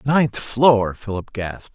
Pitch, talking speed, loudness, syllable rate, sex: 115 Hz, 135 wpm, -20 LUFS, 3.7 syllables/s, male